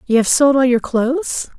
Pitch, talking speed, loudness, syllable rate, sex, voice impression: 260 Hz, 225 wpm, -15 LUFS, 5.0 syllables/s, female, very feminine, adult-like, slightly middle-aged, very thin, very tensed, very powerful, very bright, hard, very clear, very fluent, cool, intellectual, very refreshing, sincere, slightly calm, slightly friendly, slightly reassuring, very unique, elegant, slightly sweet, very lively, strict, intense, sharp